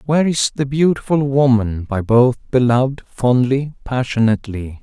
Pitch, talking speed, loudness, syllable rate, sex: 125 Hz, 125 wpm, -17 LUFS, 4.8 syllables/s, male